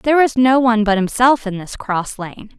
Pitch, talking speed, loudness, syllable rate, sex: 230 Hz, 230 wpm, -15 LUFS, 5.2 syllables/s, female